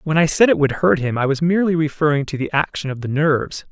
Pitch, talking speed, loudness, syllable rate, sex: 150 Hz, 275 wpm, -18 LUFS, 6.4 syllables/s, male